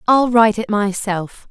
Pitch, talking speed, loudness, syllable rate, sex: 215 Hz, 160 wpm, -16 LUFS, 4.4 syllables/s, female